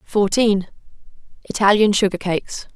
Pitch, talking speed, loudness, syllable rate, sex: 200 Hz, 65 wpm, -18 LUFS, 5.1 syllables/s, female